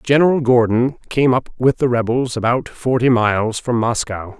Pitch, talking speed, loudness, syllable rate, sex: 120 Hz, 165 wpm, -17 LUFS, 4.8 syllables/s, male